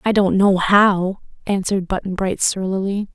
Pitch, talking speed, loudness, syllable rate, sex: 195 Hz, 155 wpm, -18 LUFS, 4.7 syllables/s, female